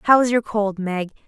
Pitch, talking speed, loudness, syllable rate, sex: 210 Hz, 235 wpm, -20 LUFS, 4.7 syllables/s, female